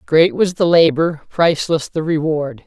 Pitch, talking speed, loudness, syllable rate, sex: 155 Hz, 160 wpm, -16 LUFS, 4.5 syllables/s, female